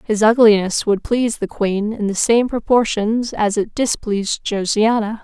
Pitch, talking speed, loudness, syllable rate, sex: 215 Hz, 160 wpm, -17 LUFS, 4.5 syllables/s, female